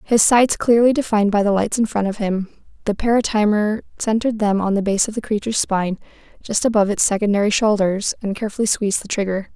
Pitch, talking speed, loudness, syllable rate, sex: 210 Hz, 200 wpm, -18 LUFS, 6.4 syllables/s, female